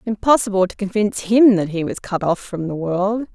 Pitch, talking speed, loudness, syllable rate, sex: 200 Hz, 215 wpm, -18 LUFS, 5.4 syllables/s, female